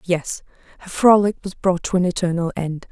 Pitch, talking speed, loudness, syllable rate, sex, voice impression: 180 Hz, 185 wpm, -19 LUFS, 5.3 syllables/s, female, very feminine, very adult-like, slightly middle-aged, very thin, very relaxed, very weak, dark, very soft, muffled, slightly fluent, cute, slightly cool, very intellectual, slightly refreshing, sincere, very calm, very friendly, very reassuring, very unique, very elegant, sweet, very kind, modest